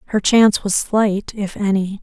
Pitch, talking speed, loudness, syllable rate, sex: 205 Hz, 180 wpm, -17 LUFS, 4.6 syllables/s, female